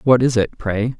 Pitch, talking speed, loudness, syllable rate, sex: 115 Hz, 240 wpm, -18 LUFS, 4.5 syllables/s, male